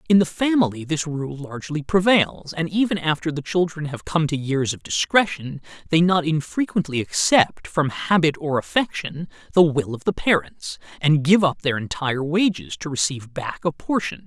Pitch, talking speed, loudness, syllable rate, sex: 155 Hz, 175 wpm, -21 LUFS, 5.0 syllables/s, male